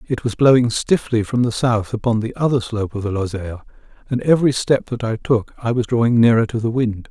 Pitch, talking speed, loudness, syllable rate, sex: 115 Hz, 230 wpm, -18 LUFS, 5.9 syllables/s, male